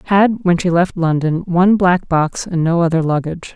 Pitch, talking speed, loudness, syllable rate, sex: 175 Hz, 205 wpm, -15 LUFS, 5.2 syllables/s, female